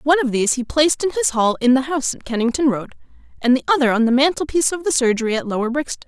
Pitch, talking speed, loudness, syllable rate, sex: 265 Hz, 255 wpm, -18 LUFS, 7.6 syllables/s, female